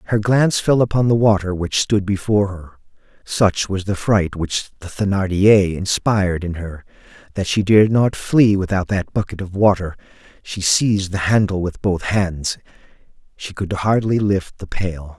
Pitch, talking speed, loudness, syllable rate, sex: 100 Hz, 170 wpm, -18 LUFS, 4.7 syllables/s, male